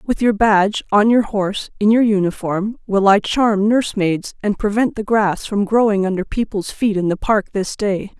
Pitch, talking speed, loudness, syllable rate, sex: 205 Hz, 205 wpm, -17 LUFS, 4.8 syllables/s, female